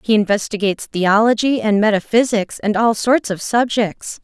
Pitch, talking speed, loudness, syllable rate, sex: 215 Hz, 140 wpm, -17 LUFS, 4.9 syllables/s, female